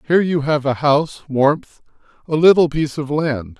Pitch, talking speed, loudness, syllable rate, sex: 150 Hz, 185 wpm, -17 LUFS, 5.2 syllables/s, male